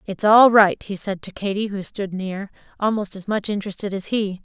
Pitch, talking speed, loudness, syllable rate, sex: 200 Hz, 215 wpm, -20 LUFS, 5.2 syllables/s, female